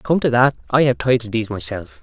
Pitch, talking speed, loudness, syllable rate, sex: 120 Hz, 235 wpm, -18 LUFS, 5.4 syllables/s, male